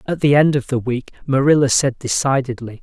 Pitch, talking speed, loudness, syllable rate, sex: 135 Hz, 190 wpm, -17 LUFS, 5.4 syllables/s, male